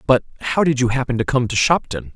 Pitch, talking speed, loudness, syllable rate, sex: 125 Hz, 250 wpm, -18 LUFS, 6.5 syllables/s, male